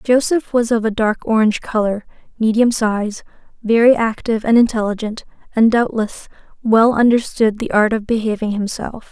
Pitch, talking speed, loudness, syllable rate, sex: 225 Hz, 145 wpm, -16 LUFS, 5.0 syllables/s, female